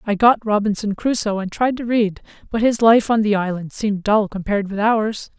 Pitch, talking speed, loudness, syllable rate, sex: 215 Hz, 210 wpm, -19 LUFS, 5.3 syllables/s, female